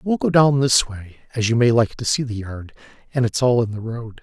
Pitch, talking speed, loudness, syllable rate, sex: 120 Hz, 270 wpm, -19 LUFS, 5.3 syllables/s, male